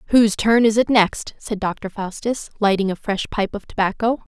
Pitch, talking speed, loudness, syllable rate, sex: 210 Hz, 195 wpm, -20 LUFS, 5.2 syllables/s, female